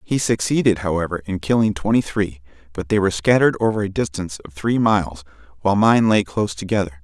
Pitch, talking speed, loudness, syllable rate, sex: 100 Hz, 190 wpm, -19 LUFS, 6.3 syllables/s, male